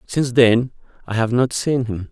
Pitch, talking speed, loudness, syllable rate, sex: 120 Hz, 200 wpm, -18 LUFS, 4.9 syllables/s, male